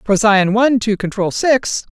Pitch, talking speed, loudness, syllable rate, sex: 215 Hz, 155 wpm, -15 LUFS, 4.6 syllables/s, female